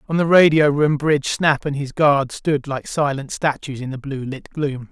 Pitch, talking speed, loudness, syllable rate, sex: 145 Hz, 220 wpm, -19 LUFS, 4.7 syllables/s, male